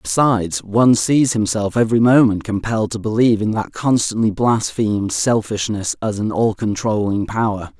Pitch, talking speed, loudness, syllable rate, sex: 110 Hz, 145 wpm, -17 LUFS, 5.1 syllables/s, male